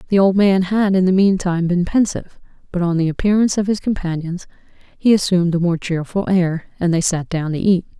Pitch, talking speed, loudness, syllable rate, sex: 185 Hz, 210 wpm, -17 LUFS, 5.8 syllables/s, female